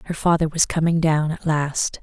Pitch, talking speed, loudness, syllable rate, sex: 160 Hz, 210 wpm, -20 LUFS, 4.9 syllables/s, female